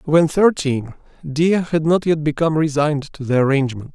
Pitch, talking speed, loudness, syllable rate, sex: 150 Hz, 165 wpm, -18 LUFS, 5.4 syllables/s, male